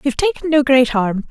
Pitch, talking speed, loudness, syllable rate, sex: 270 Hz, 230 wpm, -15 LUFS, 5.8 syllables/s, female